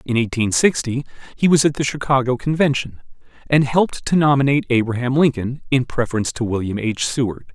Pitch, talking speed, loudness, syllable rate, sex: 130 Hz, 165 wpm, -19 LUFS, 6.0 syllables/s, male